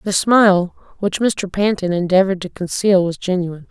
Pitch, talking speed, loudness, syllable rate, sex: 185 Hz, 160 wpm, -17 LUFS, 5.4 syllables/s, female